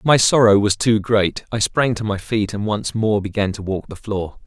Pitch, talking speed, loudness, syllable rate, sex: 105 Hz, 240 wpm, -19 LUFS, 4.8 syllables/s, male